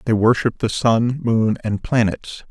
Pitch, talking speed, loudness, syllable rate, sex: 115 Hz, 170 wpm, -19 LUFS, 4.5 syllables/s, male